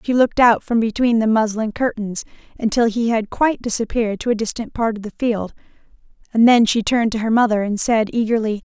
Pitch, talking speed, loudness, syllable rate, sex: 225 Hz, 205 wpm, -18 LUFS, 5.9 syllables/s, female